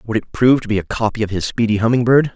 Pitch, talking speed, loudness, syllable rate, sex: 115 Hz, 305 wpm, -17 LUFS, 7.1 syllables/s, male